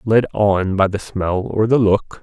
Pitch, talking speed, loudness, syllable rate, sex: 105 Hz, 215 wpm, -17 LUFS, 3.8 syllables/s, male